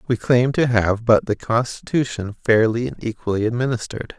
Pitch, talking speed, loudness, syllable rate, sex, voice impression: 115 Hz, 160 wpm, -20 LUFS, 5.2 syllables/s, male, very masculine, very adult-like, slightly middle-aged, very thick, tensed, slightly powerful, slightly dark, hard, slightly muffled, fluent, very cool, very intellectual, refreshing, sincere, very calm, very mature, friendly, reassuring, slightly unique, elegant, slightly sweet, slightly lively, kind, slightly modest